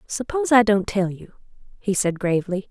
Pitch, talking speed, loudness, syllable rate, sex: 205 Hz, 175 wpm, -21 LUFS, 5.7 syllables/s, female